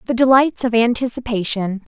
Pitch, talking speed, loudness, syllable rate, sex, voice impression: 235 Hz, 125 wpm, -17 LUFS, 5.3 syllables/s, female, feminine, slightly young, tensed, powerful, bright, clear, slightly cute, friendly, lively, intense